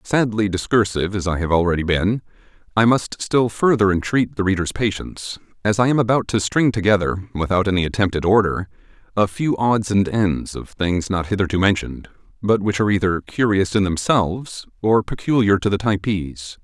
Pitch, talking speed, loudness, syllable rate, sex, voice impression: 100 Hz, 175 wpm, -19 LUFS, 5.3 syllables/s, male, very masculine, slightly old, very thick, very tensed, very powerful, bright, soft, slightly muffled, very fluent, very cool, very intellectual, refreshing, very sincere, very calm, very mature, very friendly, very reassuring, very unique, elegant, very wild, sweet, lively, kind